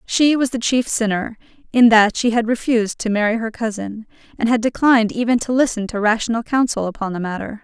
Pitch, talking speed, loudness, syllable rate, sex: 225 Hz, 205 wpm, -18 LUFS, 5.8 syllables/s, female